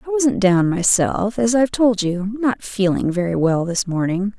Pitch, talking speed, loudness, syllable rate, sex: 205 Hz, 180 wpm, -18 LUFS, 4.5 syllables/s, female